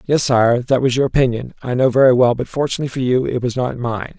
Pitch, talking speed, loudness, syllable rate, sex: 125 Hz, 260 wpm, -17 LUFS, 6.3 syllables/s, male